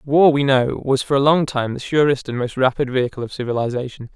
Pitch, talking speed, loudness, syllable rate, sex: 135 Hz, 230 wpm, -19 LUFS, 5.9 syllables/s, male